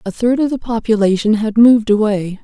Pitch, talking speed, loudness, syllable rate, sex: 220 Hz, 195 wpm, -14 LUFS, 5.6 syllables/s, female